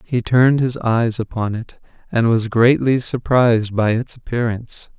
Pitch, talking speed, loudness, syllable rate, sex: 120 Hz, 155 wpm, -17 LUFS, 4.6 syllables/s, male